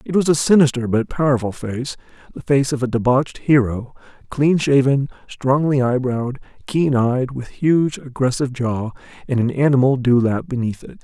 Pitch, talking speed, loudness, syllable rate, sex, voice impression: 130 Hz, 165 wpm, -18 LUFS, 5.0 syllables/s, male, very masculine, old, very thick, relaxed, slightly weak, dark, slightly hard, clear, fluent, slightly cool, intellectual, sincere, very calm, very mature, slightly friendly, slightly reassuring, unique, slightly elegant, wild, slightly sweet, lively, kind, modest